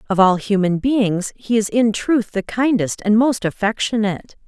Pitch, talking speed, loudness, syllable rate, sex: 215 Hz, 175 wpm, -18 LUFS, 4.6 syllables/s, female